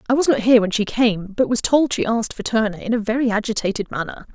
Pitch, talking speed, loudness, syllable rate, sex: 225 Hz, 265 wpm, -19 LUFS, 6.6 syllables/s, female